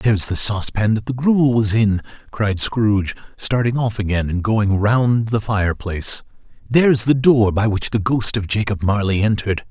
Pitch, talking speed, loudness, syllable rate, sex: 110 Hz, 180 wpm, -18 LUFS, 4.9 syllables/s, male